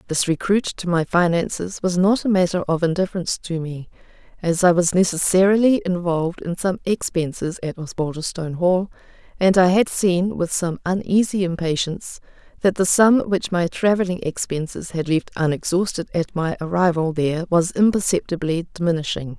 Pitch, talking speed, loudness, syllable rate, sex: 180 Hz, 150 wpm, -20 LUFS, 5.2 syllables/s, female